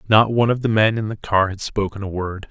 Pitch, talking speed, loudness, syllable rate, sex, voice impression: 105 Hz, 285 wpm, -19 LUFS, 6.0 syllables/s, male, very masculine, very middle-aged, very thick, tensed, powerful, slightly dark, slightly hard, muffled, fluent, very cool, very intellectual, sincere, very calm, very mature, very friendly, very reassuring, very unique, elegant, very wild, sweet, slightly lively, kind, slightly modest